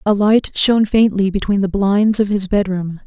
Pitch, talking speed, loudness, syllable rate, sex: 200 Hz, 195 wpm, -15 LUFS, 4.8 syllables/s, female